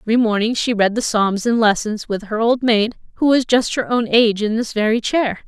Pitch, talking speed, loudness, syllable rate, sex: 225 Hz, 230 wpm, -17 LUFS, 5.6 syllables/s, female